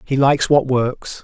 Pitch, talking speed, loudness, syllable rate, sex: 130 Hz, 195 wpm, -17 LUFS, 4.6 syllables/s, male